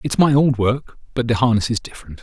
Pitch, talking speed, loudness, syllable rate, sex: 120 Hz, 240 wpm, -18 LUFS, 6.1 syllables/s, male